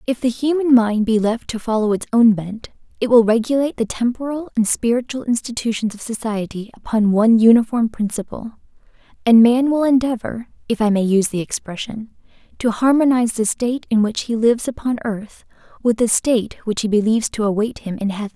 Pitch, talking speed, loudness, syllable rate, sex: 230 Hz, 185 wpm, -18 LUFS, 5.8 syllables/s, female